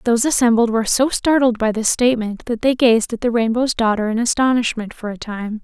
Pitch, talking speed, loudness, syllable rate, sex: 230 Hz, 215 wpm, -17 LUFS, 5.8 syllables/s, female